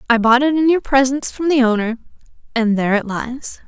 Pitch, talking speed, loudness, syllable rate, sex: 250 Hz, 195 wpm, -16 LUFS, 5.9 syllables/s, female